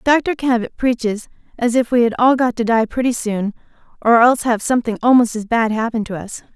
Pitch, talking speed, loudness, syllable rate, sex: 235 Hz, 210 wpm, -17 LUFS, 5.6 syllables/s, female